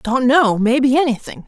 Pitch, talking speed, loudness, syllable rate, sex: 255 Hz, 165 wpm, -15 LUFS, 4.9 syllables/s, female